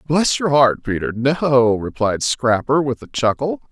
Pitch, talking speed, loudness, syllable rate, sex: 130 Hz, 160 wpm, -18 LUFS, 4.2 syllables/s, male